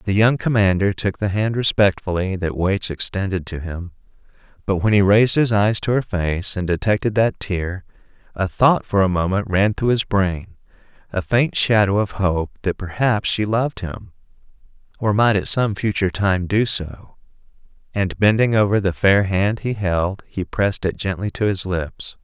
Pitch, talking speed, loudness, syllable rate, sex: 100 Hz, 180 wpm, -19 LUFS, 4.6 syllables/s, male